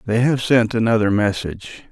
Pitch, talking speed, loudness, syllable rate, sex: 115 Hz, 155 wpm, -18 LUFS, 5.3 syllables/s, male